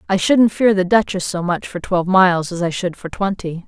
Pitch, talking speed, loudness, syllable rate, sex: 185 Hz, 245 wpm, -17 LUFS, 5.4 syllables/s, female